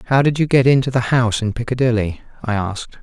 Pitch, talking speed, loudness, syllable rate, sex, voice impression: 120 Hz, 220 wpm, -17 LUFS, 6.6 syllables/s, male, very masculine, very adult-like, very old, very thick, tensed, powerful, slightly bright, very soft, very cool, intellectual, refreshing, very sincere, very calm, very mature, friendly, reassuring, very unique, slightly elegant, wild, very sweet, lively, kind, slightly modest